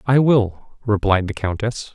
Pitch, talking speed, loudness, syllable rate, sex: 110 Hz, 155 wpm, -19 LUFS, 4.0 syllables/s, male